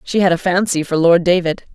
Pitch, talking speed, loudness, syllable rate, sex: 175 Hz, 240 wpm, -15 LUFS, 5.7 syllables/s, female